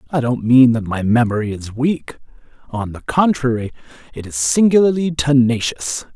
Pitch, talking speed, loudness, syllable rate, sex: 125 Hz, 145 wpm, -17 LUFS, 4.9 syllables/s, male